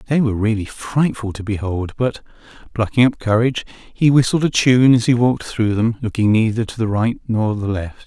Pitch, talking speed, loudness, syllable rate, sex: 115 Hz, 200 wpm, -18 LUFS, 5.4 syllables/s, male